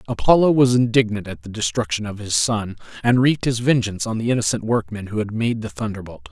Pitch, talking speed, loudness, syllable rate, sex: 115 Hz, 210 wpm, -20 LUFS, 6.2 syllables/s, male